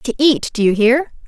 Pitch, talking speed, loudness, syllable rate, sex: 250 Hz, 190 wpm, -15 LUFS, 4.8 syllables/s, female